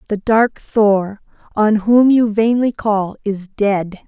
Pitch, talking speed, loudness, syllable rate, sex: 210 Hz, 145 wpm, -15 LUFS, 3.2 syllables/s, female